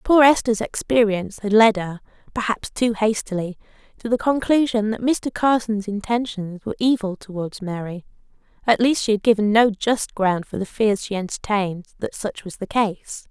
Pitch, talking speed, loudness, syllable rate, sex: 215 Hz, 170 wpm, -21 LUFS, 5.0 syllables/s, female